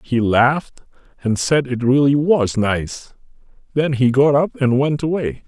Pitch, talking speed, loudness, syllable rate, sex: 130 Hz, 165 wpm, -17 LUFS, 4.1 syllables/s, male